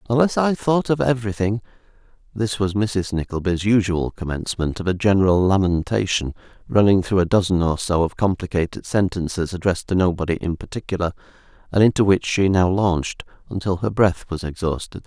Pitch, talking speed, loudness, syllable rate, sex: 95 Hz, 160 wpm, -20 LUFS, 5.4 syllables/s, male